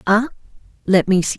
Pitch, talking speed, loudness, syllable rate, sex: 195 Hz, 175 wpm, -17 LUFS, 6.1 syllables/s, female